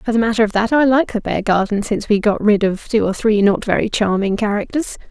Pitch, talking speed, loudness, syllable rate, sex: 215 Hz, 245 wpm, -17 LUFS, 5.9 syllables/s, female